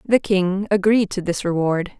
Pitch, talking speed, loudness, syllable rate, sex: 190 Hz, 180 wpm, -19 LUFS, 4.5 syllables/s, female